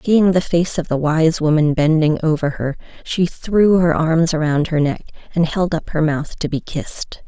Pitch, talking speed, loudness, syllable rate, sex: 160 Hz, 205 wpm, -17 LUFS, 4.6 syllables/s, female